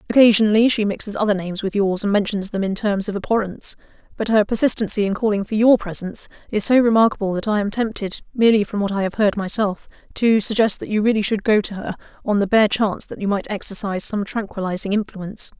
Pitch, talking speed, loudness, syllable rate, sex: 205 Hz, 215 wpm, -19 LUFS, 6.4 syllables/s, female